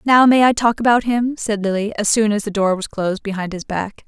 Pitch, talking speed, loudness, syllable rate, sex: 215 Hz, 265 wpm, -17 LUFS, 5.4 syllables/s, female